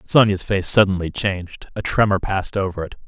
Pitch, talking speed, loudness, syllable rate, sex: 95 Hz, 175 wpm, -19 LUFS, 5.7 syllables/s, male